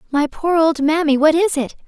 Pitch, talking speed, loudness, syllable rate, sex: 305 Hz, 225 wpm, -16 LUFS, 5.1 syllables/s, female